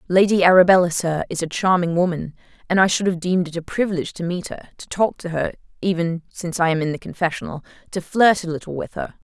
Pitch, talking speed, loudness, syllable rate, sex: 175 Hz, 200 wpm, -20 LUFS, 6.5 syllables/s, female